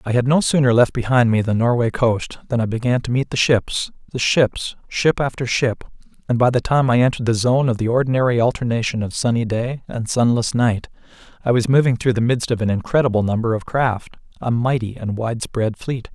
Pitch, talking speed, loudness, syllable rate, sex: 120 Hz, 210 wpm, -19 LUFS, 5.5 syllables/s, male